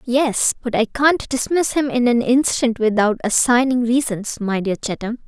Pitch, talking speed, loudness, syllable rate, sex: 240 Hz, 170 wpm, -18 LUFS, 4.5 syllables/s, female